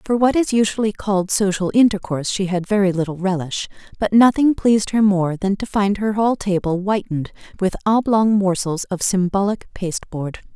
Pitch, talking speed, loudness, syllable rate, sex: 200 Hz, 170 wpm, -19 LUFS, 5.3 syllables/s, female